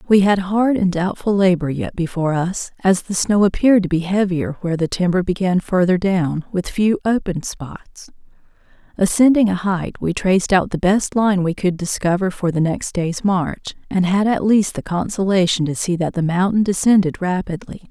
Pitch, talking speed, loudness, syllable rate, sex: 185 Hz, 190 wpm, -18 LUFS, 5.0 syllables/s, female